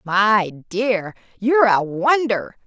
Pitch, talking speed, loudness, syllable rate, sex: 215 Hz, 115 wpm, -19 LUFS, 3.4 syllables/s, female